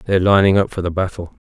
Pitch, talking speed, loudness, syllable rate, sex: 95 Hz, 245 wpm, -16 LUFS, 7.3 syllables/s, male